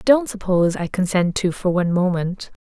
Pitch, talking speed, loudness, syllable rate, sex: 190 Hz, 180 wpm, -20 LUFS, 5.3 syllables/s, female